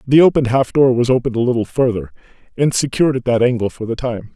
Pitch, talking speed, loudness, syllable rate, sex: 125 Hz, 235 wpm, -16 LUFS, 6.9 syllables/s, male